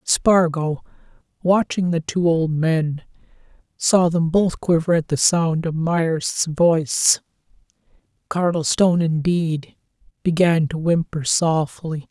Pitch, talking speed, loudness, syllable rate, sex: 165 Hz, 110 wpm, -19 LUFS, 3.6 syllables/s, male